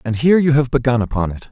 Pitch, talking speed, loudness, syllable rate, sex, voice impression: 125 Hz, 275 wpm, -16 LUFS, 7.1 syllables/s, male, masculine, adult-like, clear, slightly refreshing, sincere